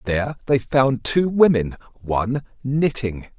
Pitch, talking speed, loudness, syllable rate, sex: 130 Hz, 125 wpm, -20 LUFS, 4.3 syllables/s, male